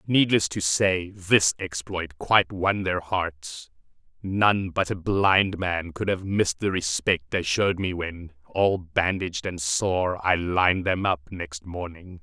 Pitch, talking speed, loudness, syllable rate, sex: 90 Hz, 160 wpm, -24 LUFS, 3.8 syllables/s, male